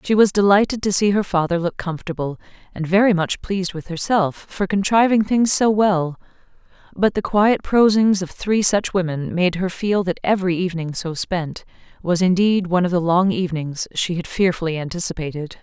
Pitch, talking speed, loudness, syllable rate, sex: 185 Hz, 180 wpm, -19 LUFS, 5.3 syllables/s, female